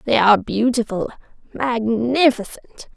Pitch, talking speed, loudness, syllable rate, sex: 230 Hz, 60 wpm, -18 LUFS, 4.2 syllables/s, female